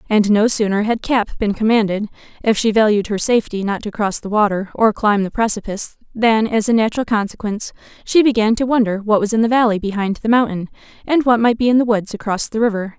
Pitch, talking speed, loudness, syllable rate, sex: 215 Hz, 220 wpm, -17 LUFS, 6.1 syllables/s, female